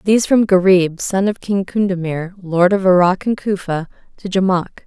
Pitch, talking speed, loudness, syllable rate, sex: 190 Hz, 175 wpm, -16 LUFS, 5.0 syllables/s, female